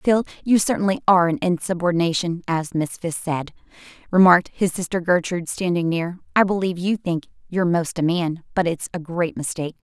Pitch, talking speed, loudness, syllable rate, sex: 175 Hz, 175 wpm, -21 LUFS, 5.7 syllables/s, female